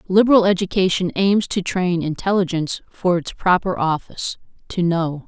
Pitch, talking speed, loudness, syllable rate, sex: 180 Hz, 135 wpm, -19 LUFS, 5.1 syllables/s, female